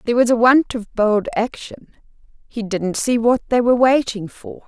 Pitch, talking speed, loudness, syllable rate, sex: 230 Hz, 195 wpm, -17 LUFS, 4.8 syllables/s, female